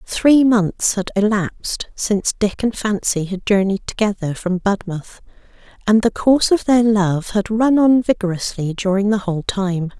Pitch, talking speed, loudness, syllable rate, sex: 205 Hz, 160 wpm, -17 LUFS, 4.5 syllables/s, female